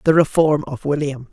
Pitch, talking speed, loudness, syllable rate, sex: 145 Hz, 180 wpm, -18 LUFS, 5.0 syllables/s, female